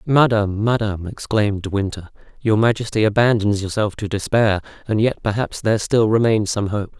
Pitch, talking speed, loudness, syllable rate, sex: 105 Hz, 165 wpm, -19 LUFS, 5.5 syllables/s, male